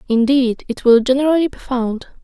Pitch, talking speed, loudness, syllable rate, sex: 255 Hz, 160 wpm, -16 LUFS, 5.3 syllables/s, female